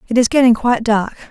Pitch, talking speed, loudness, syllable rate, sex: 235 Hz, 230 wpm, -14 LUFS, 6.9 syllables/s, female